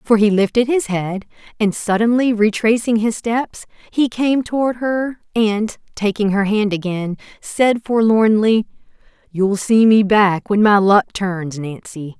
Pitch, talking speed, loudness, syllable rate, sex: 215 Hz, 150 wpm, -17 LUFS, 4.0 syllables/s, female